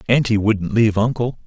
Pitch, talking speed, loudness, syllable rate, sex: 110 Hz, 165 wpm, -18 LUFS, 5.6 syllables/s, male